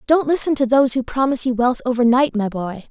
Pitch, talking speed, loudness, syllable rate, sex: 250 Hz, 225 wpm, -18 LUFS, 6.2 syllables/s, female